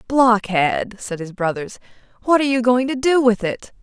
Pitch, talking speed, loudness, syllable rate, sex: 230 Hz, 190 wpm, -18 LUFS, 4.8 syllables/s, female